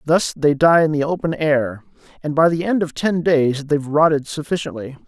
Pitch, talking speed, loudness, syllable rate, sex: 150 Hz, 200 wpm, -18 LUFS, 5.1 syllables/s, male